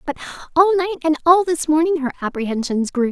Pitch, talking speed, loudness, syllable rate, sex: 305 Hz, 190 wpm, -18 LUFS, 6.1 syllables/s, female